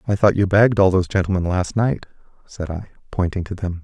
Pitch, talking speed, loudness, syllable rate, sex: 95 Hz, 220 wpm, -19 LUFS, 6.2 syllables/s, male